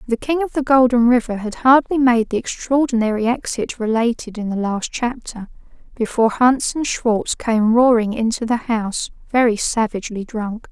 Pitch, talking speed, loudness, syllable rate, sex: 235 Hz, 160 wpm, -18 LUFS, 5.0 syllables/s, female